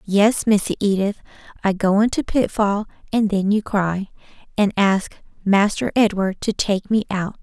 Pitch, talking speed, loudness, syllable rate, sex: 205 Hz, 155 wpm, -20 LUFS, 4.5 syllables/s, female